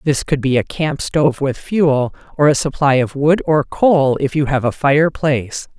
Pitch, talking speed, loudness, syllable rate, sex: 145 Hz, 205 wpm, -16 LUFS, 4.6 syllables/s, female